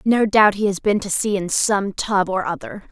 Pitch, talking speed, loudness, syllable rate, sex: 200 Hz, 245 wpm, -19 LUFS, 4.7 syllables/s, female